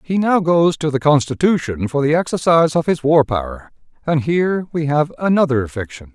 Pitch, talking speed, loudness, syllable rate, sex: 150 Hz, 185 wpm, -17 LUFS, 5.4 syllables/s, male